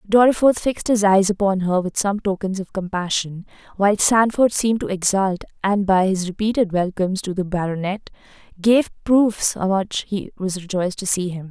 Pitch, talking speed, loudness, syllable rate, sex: 195 Hz, 175 wpm, -20 LUFS, 5.1 syllables/s, female